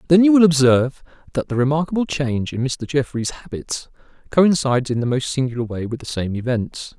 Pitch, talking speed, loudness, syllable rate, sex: 135 Hz, 190 wpm, -19 LUFS, 5.8 syllables/s, male